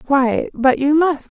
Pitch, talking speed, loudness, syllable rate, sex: 280 Hz, 170 wpm, -16 LUFS, 3.6 syllables/s, female